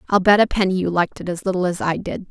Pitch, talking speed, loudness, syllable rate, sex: 185 Hz, 315 wpm, -19 LUFS, 7.1 syllables/s, female